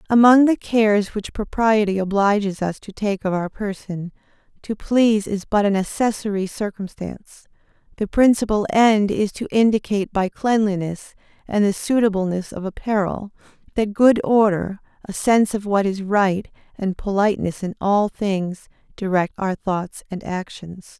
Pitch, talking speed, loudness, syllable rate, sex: 205 Hz, 145 wpm, -20 LUFS, 4.7 syllables/s, female